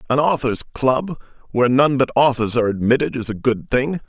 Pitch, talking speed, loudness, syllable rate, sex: 130 Hz, 190 wpm, -18 LUFS, 5.7 syllables/s, male